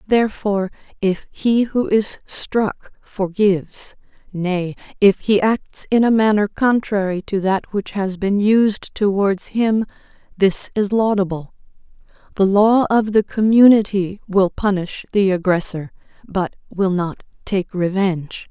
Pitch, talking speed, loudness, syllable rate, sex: 200 Hz, 130 wpm, -18 LUFS, 3.9 syllables/s, female